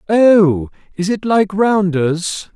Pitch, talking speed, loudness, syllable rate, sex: 190 Hz, 120 wpm, -15 LUFS, 2.9 syllables/s, male